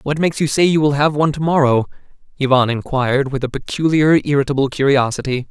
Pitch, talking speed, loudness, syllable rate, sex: 140 Hz, 185 wpm, -16 LUFS, 6.4 syllables/s, male